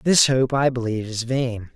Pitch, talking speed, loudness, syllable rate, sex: 125 Hz, 205 wpm, -21 LUFS, 5.0 syllables/s, male